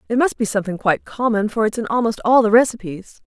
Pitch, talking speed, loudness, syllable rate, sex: 225 Hz, 240 wpm, -18 LUFS, 6.7 syllables/s, female